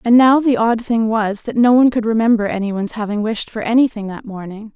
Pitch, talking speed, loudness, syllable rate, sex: 225 Hz, 225 wpm, -16 LUFS, 5.8 syllables/s, female